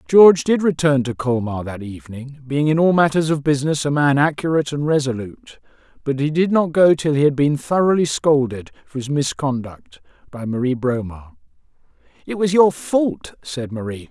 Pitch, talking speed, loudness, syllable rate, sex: 140 Hz, 175 wpm, -18 LUFS, 5.2 syllables/s, male